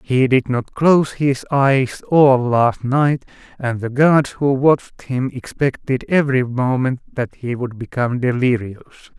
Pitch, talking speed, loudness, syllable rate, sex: 130 Hz, 150 wpm, -17 LUFS, 4.2 syllables/s, male